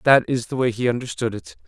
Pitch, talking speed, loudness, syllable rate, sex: 120 Hz, 250 wpm, -22 LUFS, 6.3 syllables/s, male